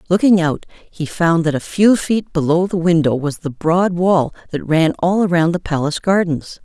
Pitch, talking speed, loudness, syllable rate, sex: 170 Hz, 200 wpm, -16 LUFS, 4.7 syllables/s, female